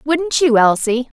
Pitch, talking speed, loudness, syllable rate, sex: 270 Hz, 150 wpm, -15 LUFS, 3.9 syllables/s, female